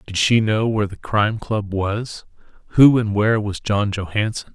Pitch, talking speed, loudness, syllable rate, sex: 105 Hz, 185 wpm, -19 LUFS, 4.9 syllables/s, male